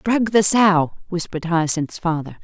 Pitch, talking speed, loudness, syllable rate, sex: 180 Hz, 150 wpm, -19 LUFS, 4.6 syllables/s, female